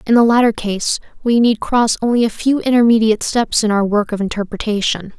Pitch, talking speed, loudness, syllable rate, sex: 220 Hz, 195 wpm, -15 LUFS, 5.7 syllables/s, female